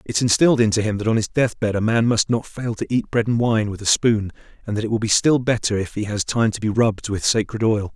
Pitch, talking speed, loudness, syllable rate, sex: 110 Hz, 300 wpm, -20 LUFS, 6.1 syllables/s, male